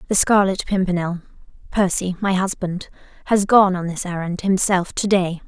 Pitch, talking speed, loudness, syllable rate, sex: 185 Hz, 130 wpm, -19 LUFS, 4.9 syllables/s, female